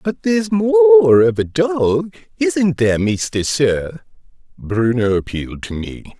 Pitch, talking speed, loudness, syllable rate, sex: 140 Hz, 135 wpm, -16 LUFS, 4.3 syllables/s, male